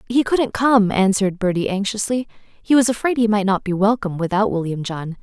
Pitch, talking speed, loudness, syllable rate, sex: 210 Hz, 185 wpm, -19 LUFS, 5.5 syllables/s, female